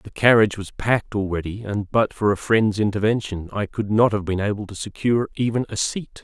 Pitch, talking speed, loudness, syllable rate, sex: 105 Hz, 210 wpm, -21 LUFS, 5.6 syllables/s, male